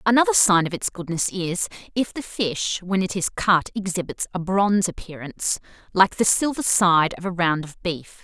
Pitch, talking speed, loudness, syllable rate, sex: 185 Hz, 190 wpm, -22 LUFS, 4.9 syllables/s, female